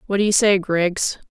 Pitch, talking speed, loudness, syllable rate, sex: 190 Hz, 230 wpm, -18 LUFS, 4.7 syllables/s, female